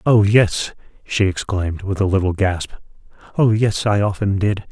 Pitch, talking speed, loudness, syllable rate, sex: 100 Hz, 165 wpm, -18 LUFS, 4.6 syllables/s, male